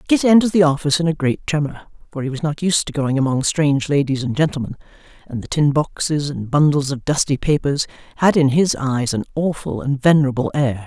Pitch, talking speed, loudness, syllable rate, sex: 145 Hz, 210 wpm, -18 LUFS, 5.9 syllables/s, female